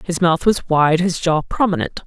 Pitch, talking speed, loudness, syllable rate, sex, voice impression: 170 Hz, 205 wpm, -17 LUFS, 4.7 syllables/s, female, feminine, middle-aged, tensed, powerful, slightly muffled, intellectual, friendly, unique, lively, slightly strict, slightly intense